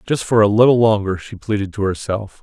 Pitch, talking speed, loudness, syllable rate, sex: 105 Hz, 225 wpm, -17 LUFS, 5.6 syllables/s, male